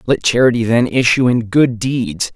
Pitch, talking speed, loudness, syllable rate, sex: 120 Hz, 180 wpm, -14 LUFS, 4.5 syllables/s, male